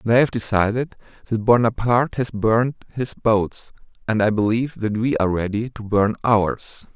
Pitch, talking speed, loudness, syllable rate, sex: 110 Hz, 165 wpm, -20 LUFS, 4.8 syllables/s, male